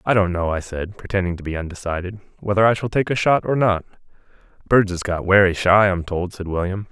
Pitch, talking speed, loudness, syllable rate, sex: 95 Hz, 225 wpm, -20 LUFS, 5.9 syllables/s, male